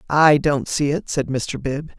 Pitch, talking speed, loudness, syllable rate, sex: 145 Hz, 210 wpm, -20 LUFS, 4.0 syllables/s, female